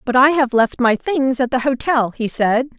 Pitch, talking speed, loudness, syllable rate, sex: 255 Hz, 235 wpm, -17 LUFS, 4.6 syllables/s, female